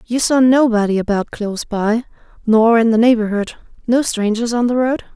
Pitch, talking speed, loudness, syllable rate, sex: 230 Hz, 150 wpm, -16 LUFS, 5.1 syllables/s, female